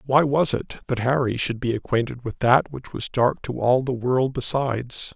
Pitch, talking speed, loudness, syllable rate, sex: 125 Hz, 210 wpm, -23 LUFS, 4.9 syllables/s, male